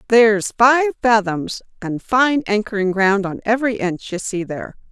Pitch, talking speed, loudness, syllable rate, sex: 215 Hz, 160 wpm, -18 LUFS, 4.8 syllables/s, female